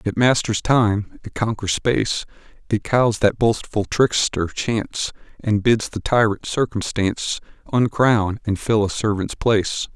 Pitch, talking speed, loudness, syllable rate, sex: 110 Hz, 140 wpm, -20 LUFS, 4.3 syllables/s, male